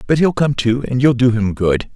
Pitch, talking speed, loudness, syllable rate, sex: 125 Hz, 275 wpm, -16 LUFS, 5.0 syllables/s, male